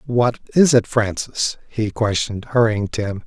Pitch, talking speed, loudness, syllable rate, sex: 115 Hz, 165 wpm, -19 LUFS, 4.3 syllables/s, male